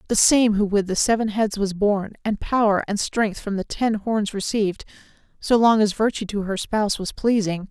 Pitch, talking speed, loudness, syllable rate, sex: 210 Hz, 210 wpm, -21 LUFS, 5.0 syllables/s, female